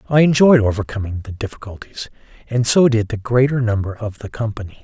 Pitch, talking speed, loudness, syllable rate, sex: 110 Hz, 175 wpm, -18 LUFS, 6.0 syllables/s, male